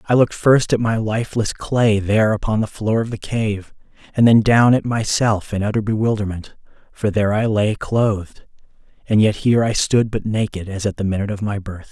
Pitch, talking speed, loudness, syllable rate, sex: 105 Hz, 205 wpm, -18 LUFS, 5.4 syllables/s, male